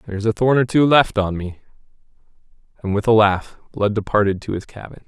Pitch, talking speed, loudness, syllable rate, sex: 105 Hz, 200 wpm, -18 LUFS, 5.8 syllables/s, male